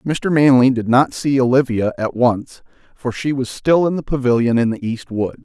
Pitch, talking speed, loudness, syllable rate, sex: 130 Hz, 210 wpm, -17 LUFS, 4.8 syllables/s, male